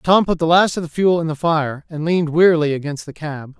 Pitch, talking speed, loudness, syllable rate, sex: 160 Hz, 265 wpm, -18 LUFS, 5.7 syllables/s, male